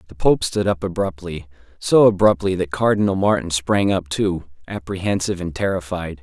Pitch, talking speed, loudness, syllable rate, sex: 90 Hz, 145 wpm, -19 LUFS, 5.3 syllables/s, male